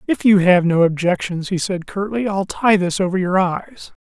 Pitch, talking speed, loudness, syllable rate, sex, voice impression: 190 Hz, 210 wpm, -17 LUFS, 4.8 syllables/s, male, slightly masculine, adult-like, muffled, slightly refreshing, unique, slightly kind